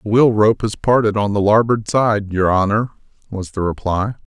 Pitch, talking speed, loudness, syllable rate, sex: 105 Hz, 195 wpm, -17 LUFS, 4.9 syllables/s, male